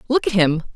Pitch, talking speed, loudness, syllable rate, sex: 220 Hz, 235 wpm, -18 LUFS, 6.1 syllables/s, female